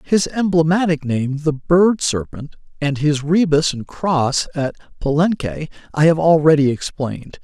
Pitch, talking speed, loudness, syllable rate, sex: 155 Hz, 135 wpm, -17 LUFS, 4.2 syllables/s, male